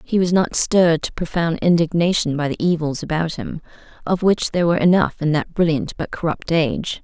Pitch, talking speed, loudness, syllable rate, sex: 165 Hz, 195 wpm, -19 LUFS, 5.6 syllables/s, female